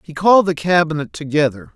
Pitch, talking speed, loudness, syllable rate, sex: 160 Hz, 170 wpm, -16 LUFS, 6.1 syllables/s, male